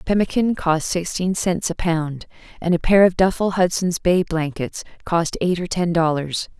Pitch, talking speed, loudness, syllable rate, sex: 175 Hz, 175 wpm, -20 LUFS, 4.5 syllables/s, female